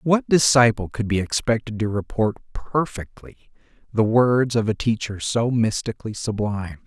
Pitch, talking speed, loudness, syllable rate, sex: 115 Hz, 140 wpm, -21 LUFS, 4.8 syllables/s, male